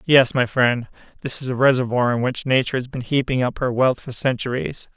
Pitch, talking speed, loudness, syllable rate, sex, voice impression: 130 Hz, 220 wpm, -20 LUFS, 5.6 syllables/s, male, masculine, adult-like, slightly thick, slightly fluent, slightly calm, unique